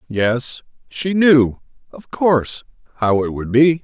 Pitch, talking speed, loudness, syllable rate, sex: 135 Hz, 140 wpm, -17 LUFS, 3.6 syllables/s, male